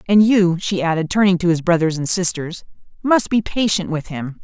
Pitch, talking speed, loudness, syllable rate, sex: 180 Hz, 205 wpm, -18 LUFS, 5.1 syllables/s, female